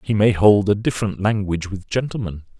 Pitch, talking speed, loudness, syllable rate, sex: 100 Hz, 185 wpm, -19 LUFS, 5.9 syllables/s, male